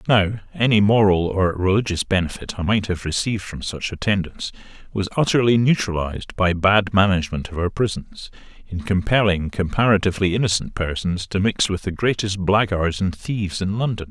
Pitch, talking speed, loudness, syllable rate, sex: 100 Hz, 155 wpm, -20 LUFS, 5.6 syllables/s, male